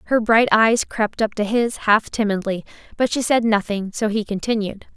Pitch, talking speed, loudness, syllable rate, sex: 215 Hz, 195 wpm, -19 LUFS, 4.9 syllables/s, female